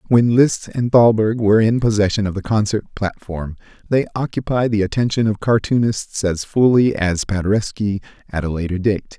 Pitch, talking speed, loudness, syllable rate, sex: 105 Hz, 165 wpm, -18 LUFS, 5.2 syllables/s, male